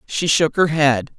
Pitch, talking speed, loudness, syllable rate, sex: 155 Hz, 205 wpm, -17 LUFS, 4.0 syllables/s, female